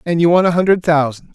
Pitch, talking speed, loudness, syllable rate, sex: 165 Hz, 265 wpm, -14 LUFS, 6.4 syllables/s, male